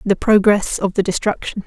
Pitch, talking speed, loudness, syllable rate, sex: 200 Hz, 180 wpm, -17 LUFS, 5.1 syllables/s, female